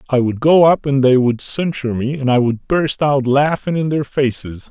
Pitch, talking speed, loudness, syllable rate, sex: 135 Hz, 230 wpm, -16 LUFS, 4.9 syllables/s, male